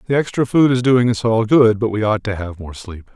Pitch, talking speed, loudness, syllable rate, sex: 110 Hz, 285 wpm, -16 LUFS, 5.4 syllables/s, male